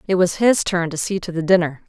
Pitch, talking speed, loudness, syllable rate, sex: 180 Hz, 285 wpm, -19 LUFS, 5.9 syllables/s, female